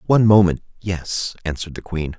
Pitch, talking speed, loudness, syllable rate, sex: 90 Hz, 165 wpm, -20 LUFS, 5.6 syllables/s, male